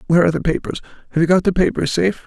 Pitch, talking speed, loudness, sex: 170 Hz, 240 wpm, -18 LUFS, male